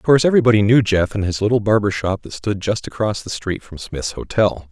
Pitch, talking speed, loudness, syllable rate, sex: 105 Hz, 240 wpm, -18 LUFS, 6.0 syllables/s, male